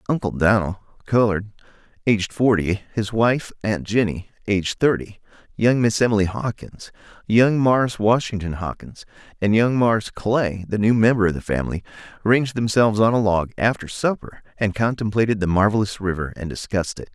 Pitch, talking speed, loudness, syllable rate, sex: 105 Hz, 155 wpm, -20 LUFS, 5.2 syllables/s, male